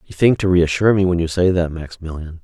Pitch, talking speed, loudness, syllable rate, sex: 85 Hz, 245 wpm, -17 LUFS, 6.4 syllables/s, male